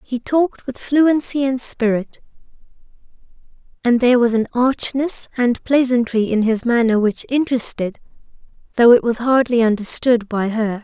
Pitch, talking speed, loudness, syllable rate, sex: 240 Hz, 135 wpm, -17 LUFS, 4.7 syllables/s, female